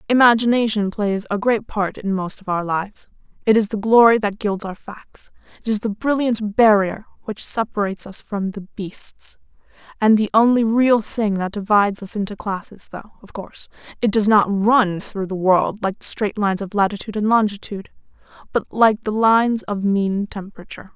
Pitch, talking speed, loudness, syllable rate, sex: 210 Hz, 175 wpm, -19 LUFS, 5.1 syllables/s, female